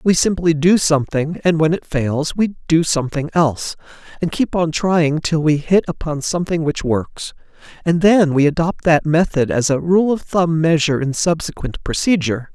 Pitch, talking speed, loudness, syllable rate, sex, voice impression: 160 Hz, 180 wpm, -17 LUFS, 4.9 syllables/s, male, masculine, adult-like, tensed, slightly powerful, bright, clear, slightly halting, intellectual, refreshing, friendly, slightly reassuring, slightly kind